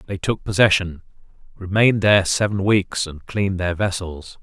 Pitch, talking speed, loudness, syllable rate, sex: 95 Hz, 150 wpm, -19 LUFS, 5.1 syllables/s, male